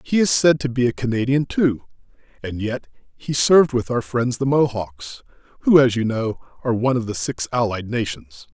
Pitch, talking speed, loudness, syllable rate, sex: 120 Hz, 195 wpm, -20 LUFS, 5.2 syllables/s, male